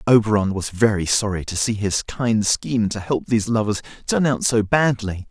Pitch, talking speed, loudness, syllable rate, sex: 110 Hz, 190 wpm, -20 LUFS, 5.1 syllables/s, male